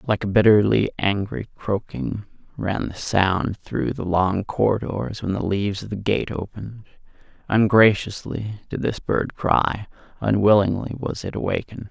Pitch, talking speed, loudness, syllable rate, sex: 100 Hz, 140 wpm, -22 LUFS, 4.5 syllables/s, male